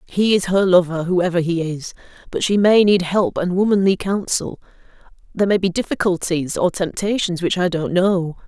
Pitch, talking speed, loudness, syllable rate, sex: 180 Hz, 170 wpm, -18 LUFS, 5.1 syllables/s, female